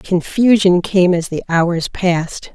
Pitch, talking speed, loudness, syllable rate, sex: 180 Hz, 140 wpm, -15 LUFS, 3.7 syllables/s, female